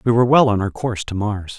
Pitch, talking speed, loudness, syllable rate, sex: 110 Hz, 300 wpm, -18 LUFS, 6.7 syllables/s, male